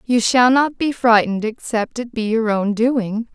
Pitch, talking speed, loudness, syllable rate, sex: 230 Hz, 195 wpm, -18 LUFS, 4.4 syllables/s, female